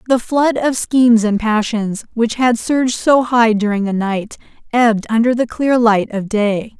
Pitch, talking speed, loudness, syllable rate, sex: 230 Hz, 185 wpm, -15 LUFS, 4.4 syllables/s, female